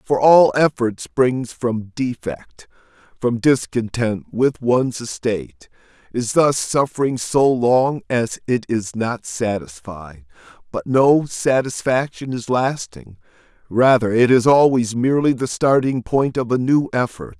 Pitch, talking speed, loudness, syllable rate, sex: 125 Hz, 125 wpm, -18 LUFS, 3.9 syllables/s, male